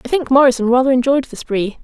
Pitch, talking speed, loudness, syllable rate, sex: 260 Hz, 230 wpm, -15 LUFS, 6.4 syllables/s, female